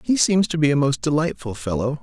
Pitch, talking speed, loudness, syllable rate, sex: 145 Hz, 240 wpm, -20 LUFS, 5.7 syllables/s, male